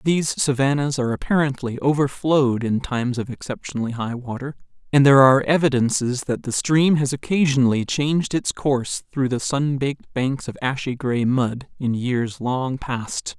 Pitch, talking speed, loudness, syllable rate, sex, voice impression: 130 Hz, 155 wpm, -21 LUFS, 5.1 syllables/s, male, masculine, adult-like, slightly tensed, powerful, slightly muffled, slightly raspy, cool, slightly intellectual, slightly refreshing, friendly, reassuring, slightly wild, lively, kind, slightly light